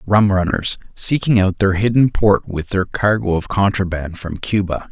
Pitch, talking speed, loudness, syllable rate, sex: 100 Hz, 170 wpm, -17 LUFS, 4.6 syllables/s, male